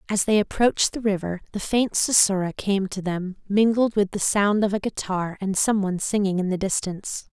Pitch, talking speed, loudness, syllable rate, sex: 200 Hz, 205 wpm, -23 LUFS, 5.3 syllables/s, female